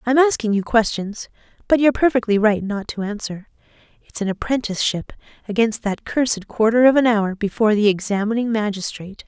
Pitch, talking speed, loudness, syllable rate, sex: 220 Hz, 160 wpm, -19 LUFS, 5.8 syllables/s, female